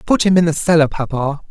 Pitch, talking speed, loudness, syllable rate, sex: 160 Hz, 240 wpm, -15 LUFS, 6.1 syllables/s, male